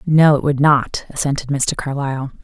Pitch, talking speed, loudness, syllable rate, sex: 140 Hz, 170 wpm, -17 LUFS, 5.1 syllables/s, female